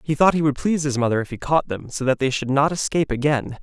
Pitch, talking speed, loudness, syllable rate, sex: 140 Hz, 300 wpm, -21 LUFS, 6.6 syllables/s, male